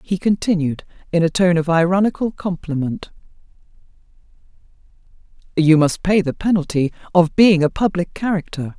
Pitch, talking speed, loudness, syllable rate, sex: 175 Hz, 125 wpm, -18 LUFS, 5.2 syllables/s, female